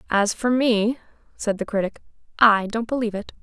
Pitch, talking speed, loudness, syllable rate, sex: 220 Hz, 175 wpm, -22 LUFS, 5.4 syllables/s, female